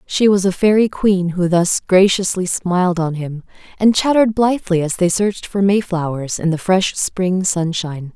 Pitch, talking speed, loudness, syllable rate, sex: 185 Hz, 175 wpm, -16 LUFS, 4.8 syllables/s, female